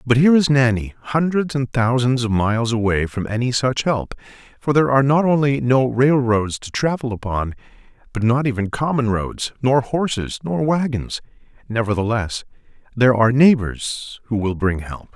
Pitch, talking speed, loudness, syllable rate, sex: 125 Hz, 160 wpm, -19 LUFS, 5.1 syllables/s, male